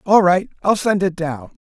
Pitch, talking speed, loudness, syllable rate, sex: 180 Hz, 220 wpm, -18 LUFS, 4.7 syllables/s, male